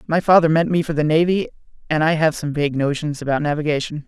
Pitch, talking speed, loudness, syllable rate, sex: 155 Hz, 220 wpm, -19 LUFS, 6.6 syllables/s, male